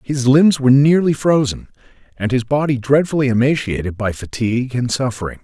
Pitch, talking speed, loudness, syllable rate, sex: 130 Hz, 155 wpm, -16 LUFS, 5.6 syllables/s, male